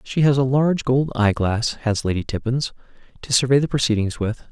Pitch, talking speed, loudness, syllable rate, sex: 125 Hz, 200 wpm, -20 LUFS, 5.6 syllables/s, male